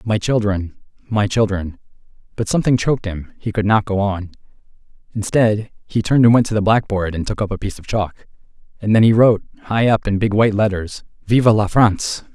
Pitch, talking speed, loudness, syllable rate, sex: 105 Hz, 190 wpm, -17 LUFS, 5.8 syllables/s, male